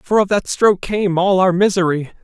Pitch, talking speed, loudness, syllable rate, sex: 190 Hz, 215 wpm, -16 LUFS, 5.2 syllables/s, male